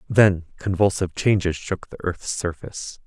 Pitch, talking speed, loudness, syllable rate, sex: 95 Hz, 135 wpm, -23 LUFS, 4.9 syllables/s, male